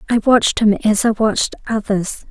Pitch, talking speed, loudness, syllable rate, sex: 215 Hz, 180 wpm, -16 LUFS, 5.1 syllables/s, female